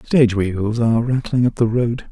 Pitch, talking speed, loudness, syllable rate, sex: 115 Hz, 200 wpm, -18 LUFS, 5.0 syllables/s, male